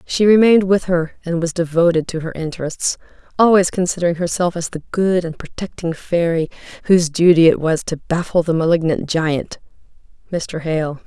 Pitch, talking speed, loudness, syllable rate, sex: 170 Hz, 165 wpm, -17 LUFS, 5.3 syllables/s, female